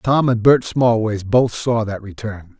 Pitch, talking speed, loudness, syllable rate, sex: 115 Hz, 185 wpm, -17 LUFS, 3.9 syllables/s, male